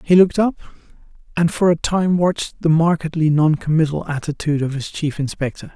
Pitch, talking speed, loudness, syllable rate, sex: 160 Hz, 175 wpm, -18 LUFS, 5.8 syllables/s, male